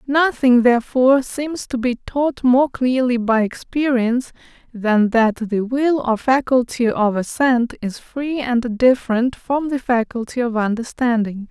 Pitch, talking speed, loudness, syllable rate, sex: 245 Hz, 140 wpm, -18 LUFS, 4.2 syllables/s, female